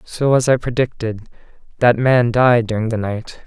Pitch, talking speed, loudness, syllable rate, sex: 120 Hz, 175 wpm, -17 LUFS, 4.7 syllables/s, male